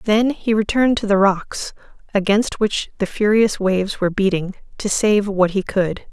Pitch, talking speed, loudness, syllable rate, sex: 205 Hz, 175 wpm, -18 LUFS, 4.8 syllables/s, female